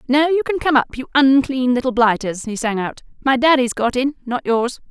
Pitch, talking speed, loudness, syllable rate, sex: 255 Hz, 220 wpm, -18 LUFS, 5.4 syllables/s, female